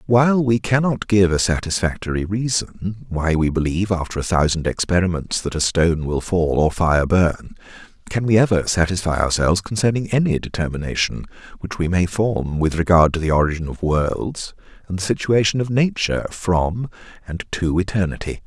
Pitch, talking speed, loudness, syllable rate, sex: 90 Hz, 165 wpm, -19 LUFS, 5.2 syllables/s, male